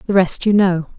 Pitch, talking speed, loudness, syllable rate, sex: 185 Hz, 245 wpm, -15 LUFS, 5.2 syllables/s, female